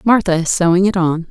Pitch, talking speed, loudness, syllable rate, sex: 180 Hz, 230 wpm, -14 LUFS, 5.8 syllables/s, female